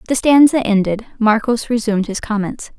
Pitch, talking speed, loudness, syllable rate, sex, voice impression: 225 Hz, 150 wpm, -16 LUFS, 5.4 syllables/s, female, feminine, slightly young, fluent, slightly cute, slightly calm, friendly, kind